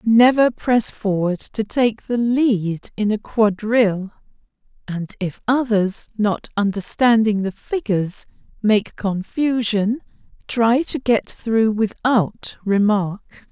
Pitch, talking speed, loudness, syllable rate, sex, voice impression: 215 Hz, 110 wpm, -19 LUFS, 3.4 syllables/s, female, very feminine, slightly adult-like, slightly middle-aged, very thin, tensed, slightly weak, bright, hard, very clear, slightly fluent, slightly cute, slightly cool, very intellectual, refreshing, very sincere, very calm, very friendly, reassuring, slightly unique, very elegant, sweet, lively, very kind